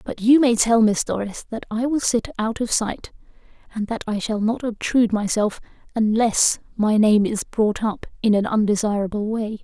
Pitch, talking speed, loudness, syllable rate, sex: 220 Hz, 185 wpm, -21 LUFS, 4.9 syllables/s, female